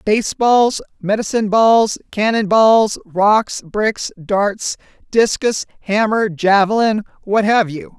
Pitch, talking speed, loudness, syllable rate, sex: 210 Hz, 100 wpm, -16 LUFS, 3.6 syllables/s, female